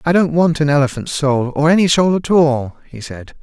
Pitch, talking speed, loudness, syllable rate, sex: 150 Hz, 230 wpm, -15 LUFS, 5.1 syllables/s, male